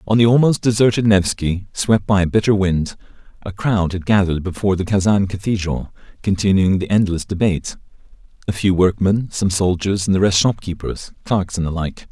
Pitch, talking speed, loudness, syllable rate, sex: 95 Hz, 180 wpm, -18 LUFS, 5.4 syllables/s, male